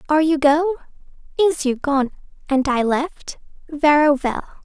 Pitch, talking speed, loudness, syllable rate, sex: 295 Hz, 105 wpm, -19 LUFS, 4.7 syllables/s, female